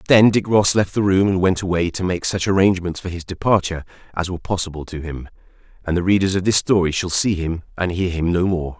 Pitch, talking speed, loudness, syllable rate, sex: 90 Hz, 240 wpm, -19 LUFS, 6.1 syllables/s, male